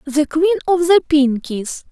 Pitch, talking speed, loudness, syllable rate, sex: 305 Hz, 155 wpm, -16 LUFS, 4.3 syllables/s, female